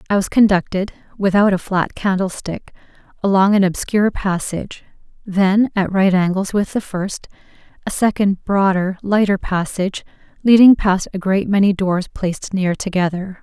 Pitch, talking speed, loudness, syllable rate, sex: 195 Hz, 145 wpm, -17 LUFS, 4.5 syllables/s, female